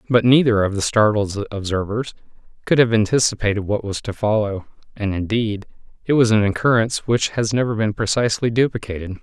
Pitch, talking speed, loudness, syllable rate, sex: 110 Hz, 165 wpm, -19 LUFS, 5.8 syllables/s, male